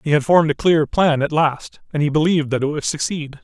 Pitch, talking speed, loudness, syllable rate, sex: 150 Hz, 260 wpm, -18 LUFS, 5.9 syllables/s, male